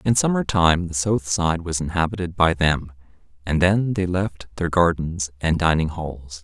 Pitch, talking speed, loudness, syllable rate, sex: 85 Hz, 175 wpm, -21 LUFS, 4.4 syllables/s, male